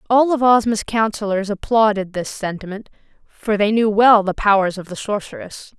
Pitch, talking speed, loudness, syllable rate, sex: 210 Hz, 165 wpm, -17 LUFS, 5.0 syllables/s, female